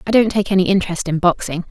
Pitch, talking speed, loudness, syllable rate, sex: 185 Hz, 245 wpm, -17 LUFS, 7.1 syllables/s, female